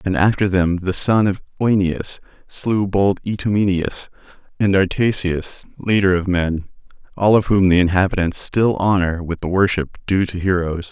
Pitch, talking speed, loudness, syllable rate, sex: 95 Hz, 155 wpm, -18 LUFS, 4.7 syllables/s, male